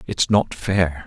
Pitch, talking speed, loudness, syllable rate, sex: 90 Hz, 170 wpm, -20 LUFS, 3.2 syllables/s, male